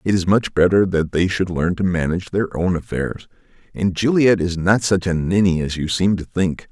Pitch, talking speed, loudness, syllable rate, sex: 90 Hz, 225 wpm, -19 LUFS, 5.1 syllables/s, male